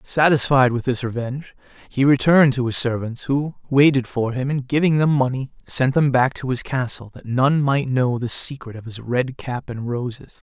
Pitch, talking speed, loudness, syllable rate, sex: 130 Hz, 200 wpm, -20 LUFS, 5.0 syllables/s, male